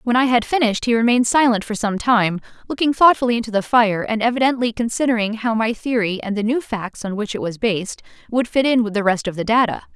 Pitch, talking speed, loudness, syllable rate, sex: 225 Hz, 235 wpm, -18 LUFS, 6.1 syllables/s, female